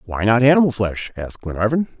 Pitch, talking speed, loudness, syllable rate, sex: 115 Hz, 180 wpm, -18 LUFS, 6.3 syllables/s, male